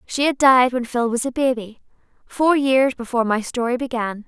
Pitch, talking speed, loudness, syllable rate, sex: 250 Hz, 195 wpm, -19 LUFS, 5.2 syllables/s, female